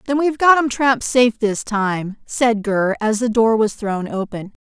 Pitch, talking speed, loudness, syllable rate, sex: 225 Hz, 210 wpm, -18 LUFS, 4.7 syllables/s, female